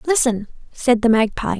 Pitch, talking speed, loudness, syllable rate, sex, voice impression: 235 Hz, 150 wpm, -18 LUFS, 4.8 syllables/s, female, very feminine, very young, very thin, tensed, slightly weak, very bright, hard, very clear, fluent, very cute, slightly intellectual, very refreshing, sincere, slightly calm, friendly, reassuring, very unique, slightly elegant, sweet, very lively, kind, slightly intense, very sharp, light